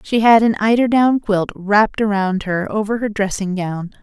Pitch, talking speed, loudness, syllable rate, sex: 210 Hz, 180 wpm, -17 LUFS, 4.8 syllables/s, female